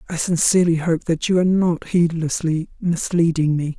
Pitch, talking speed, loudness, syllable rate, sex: 170 Hz, 160 wpm, -19 LUFS, 5.2 syllables/s, female